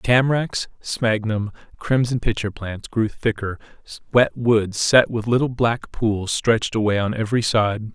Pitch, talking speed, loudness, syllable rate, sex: 115 Hz, 145 wpm, -21 LUFS, 4.3 syllables/s, male